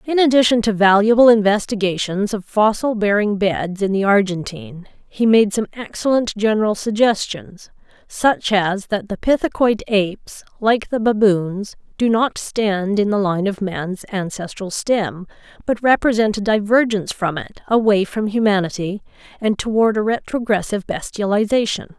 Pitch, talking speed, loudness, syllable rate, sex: 210 Hz, 140 wpm, -18 LUFS, 4.7 syllables/s, female